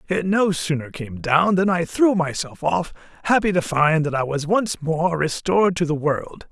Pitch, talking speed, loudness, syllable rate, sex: 165 Hz, 205 wpm, -20 LUFS, 4.5 syllables/s, male